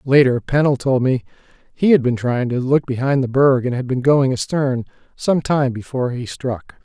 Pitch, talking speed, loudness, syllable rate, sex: 130 Hz, 200 wpm, -18 LUFS, 5.0 syllables/s, male